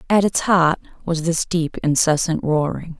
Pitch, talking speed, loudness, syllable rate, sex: 165 Hz, 160 wpm, -19 LUFS, 4.4 syllables/s, female